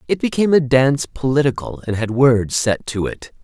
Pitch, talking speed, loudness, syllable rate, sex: 125 Hz, 190 wpm, -17 LUFS, 5.3 syllables/s, male